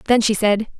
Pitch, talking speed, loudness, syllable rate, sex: 215 Hz, 225 wpm, -17 LUFS, 5.5 syllables/s, female